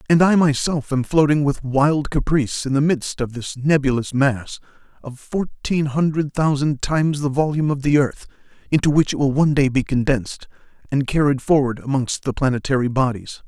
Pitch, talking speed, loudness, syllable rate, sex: 140 Hz, 180 wpm, -19 LUFS, 5.3 syllables/s, male